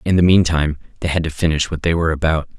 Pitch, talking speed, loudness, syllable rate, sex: 80 Hz, 255 wpm, -18 LUFS, 7.3 syllables/s, male